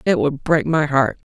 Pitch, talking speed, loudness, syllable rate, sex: 145 Hz, 230 wpm, -18 LUFS, 4.6 syllables/s, male